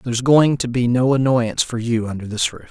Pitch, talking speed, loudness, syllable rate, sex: 120 Hz, 245 wpm, -18 LUFS, 6.0 syllables/s, male